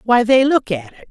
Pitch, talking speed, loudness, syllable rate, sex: 230 Hz, 270 wpm, -15 LUFS, 5.2 syllables/s, female